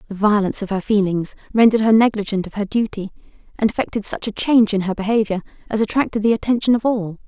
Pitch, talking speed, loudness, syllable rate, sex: 210 Hz, 205 wpm, -19 LUFS, 6.9 syllables/s, female